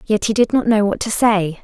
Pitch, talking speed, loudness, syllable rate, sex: 210 Hz, 295 wpm, -16 LUFS, 5.2 syllables/s, female